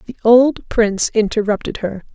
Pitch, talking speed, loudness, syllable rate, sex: 225 Hz, 140 wpm, -16 LUFS, 4.9 syllables/s, female